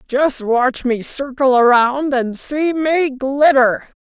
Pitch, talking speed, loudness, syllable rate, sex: 265 Hz, 135 wpm, -16 LUFS, 3.2 syllables/s, female